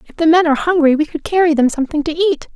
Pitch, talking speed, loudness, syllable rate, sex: 315 Hz, 280 wpm, -15 LUFS, 7.7 syllables/s, female